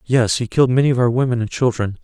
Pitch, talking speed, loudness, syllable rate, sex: 120 Hz, 265 wpm, -17 LUFS, 6.8 syllables/s, male